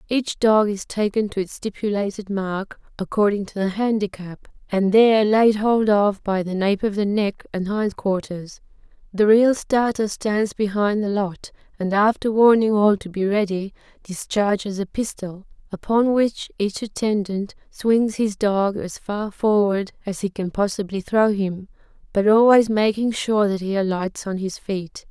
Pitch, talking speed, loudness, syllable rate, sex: 205 Hz, 165 wpm, -21 LUFS, 4.3 syllables/s, female